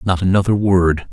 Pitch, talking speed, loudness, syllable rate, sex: 95 Hz, 160 wpm, -15 LUFS, 5.0 syllables/s, male